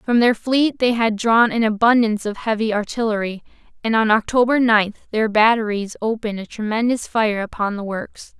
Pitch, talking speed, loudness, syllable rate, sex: 220 Hz, 170 wpm, -19 LUFS, 5.1 syllables/s, female